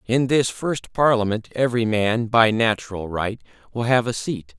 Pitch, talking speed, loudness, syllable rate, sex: 115 Hz, 170 wpm, -21 LUFS, 4.7 syllables/s, male